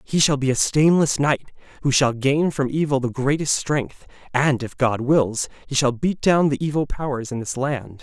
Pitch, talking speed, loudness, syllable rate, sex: 140 Hz, 210 wpm, -21 LUFS, 4.6 syllables/s, male